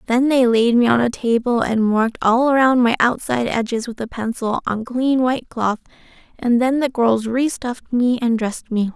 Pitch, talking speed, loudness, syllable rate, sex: 240 Hz, 210 wpm, -18 LUFS, 5.1 syllables/s, female